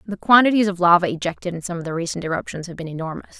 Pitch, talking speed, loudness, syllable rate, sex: 180 Hz, 245 wpm, -20 LUFS, 7.3 syllables/s, female